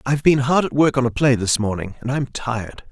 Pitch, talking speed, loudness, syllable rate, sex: 130 Hz, 270 wpm, -19 LUFS, 5.8 syllables/s, male